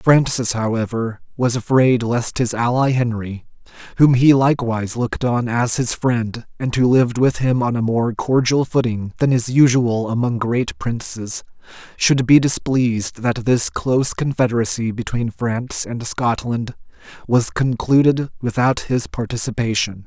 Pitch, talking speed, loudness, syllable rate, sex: 120 Hz, 145 wpm, -18 LUFS, 4.5 syllables/s, male